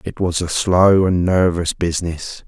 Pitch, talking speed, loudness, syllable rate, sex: 90 Hz, 170 wpm, -17 LUFS, 4.2 syllables/s, male